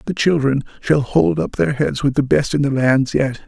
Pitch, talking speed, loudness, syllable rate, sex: 140 Hz, 240 wpm, -17 LUFS, 4.8 syllables/s, male